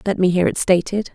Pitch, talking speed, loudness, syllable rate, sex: 185 Hz, 260 wpm, -18 LUFS, 5.9 syllables/s, female